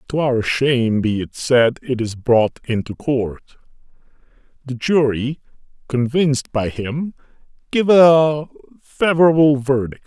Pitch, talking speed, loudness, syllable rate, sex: 135 Hz, 120 wpm, -17 LUFS, 4.1 syllables/s, male